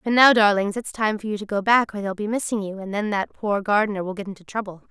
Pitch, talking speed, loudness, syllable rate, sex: 205 Hz, 295 wpm, -22 LUFS, 6.3 syllables/s, female